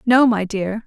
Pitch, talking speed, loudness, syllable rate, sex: 220 Hz, 210 wpm, -18 LUFS, 3.9 syllables/s, female